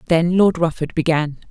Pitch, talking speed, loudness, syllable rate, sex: 165 Hz, 160 wpm, -18 LUFS, 4.7 syllables/s, female